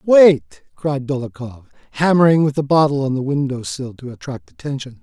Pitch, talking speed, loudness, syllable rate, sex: 135 Hz, 165 wpm, -17 LUFS, 5.2 syllables/s, male